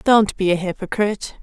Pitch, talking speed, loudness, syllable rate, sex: 200 Hz, 170 wpm, -20 LUFS, 5.4 syllables/s, female